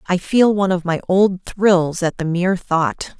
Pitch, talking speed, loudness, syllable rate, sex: 185 Hz, 205 wpm, -17 LUFS, 4.4 syllables/s, female